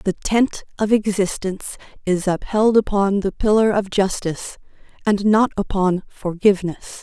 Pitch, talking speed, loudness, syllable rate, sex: 200 Hz, 130 wpm, -19 LUFS, 4.5 syllables/s, female